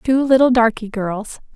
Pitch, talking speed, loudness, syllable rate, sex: 230 Hz, 155 wpm, -16 LUFS, 4.3 syllables/s, female